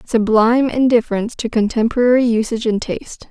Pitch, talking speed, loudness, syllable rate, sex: 230 Hz, 125 wpm, -16 LUFS, 6.3 syllables/s, female